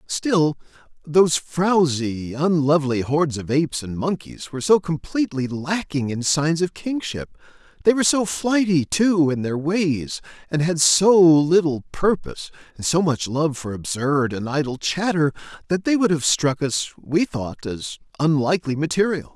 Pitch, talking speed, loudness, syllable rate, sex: 155 Hz, 150 wpm, -21 LUFS, 4.5 syllables/s, male